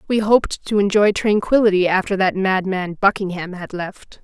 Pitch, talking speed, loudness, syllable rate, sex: 195 Hz, 155 wpm, -18 LUFS, 5.0 syllables/s, female